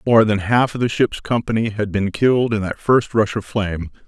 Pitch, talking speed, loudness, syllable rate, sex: 110 Hz, 220 wpm, -19 LUFS, 5.1 syllables/s, male